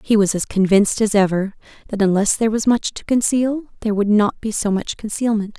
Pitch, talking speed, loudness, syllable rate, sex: 210 Hz, 215 wpm, -18 LUFS, 5.7 syllables/s, female